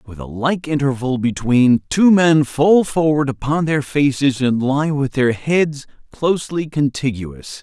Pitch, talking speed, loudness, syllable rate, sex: 140 Hz, 150 wpm, -17 LUFS, 4.0 syllables/s, male